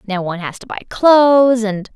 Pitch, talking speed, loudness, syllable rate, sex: 225 Hz, 215 wpm, -13 LUFS, 5.4 syllables/s, female